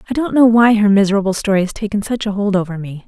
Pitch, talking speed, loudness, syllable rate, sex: 205 Hz, 275 wpm, -15 LUFS, 7.0 syllables/s, female